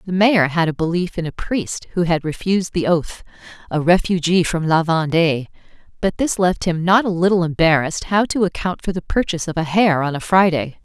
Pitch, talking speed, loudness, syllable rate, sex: 175 Hz, 210 wpm, -18 LUFS, 5.4 syllables/s, female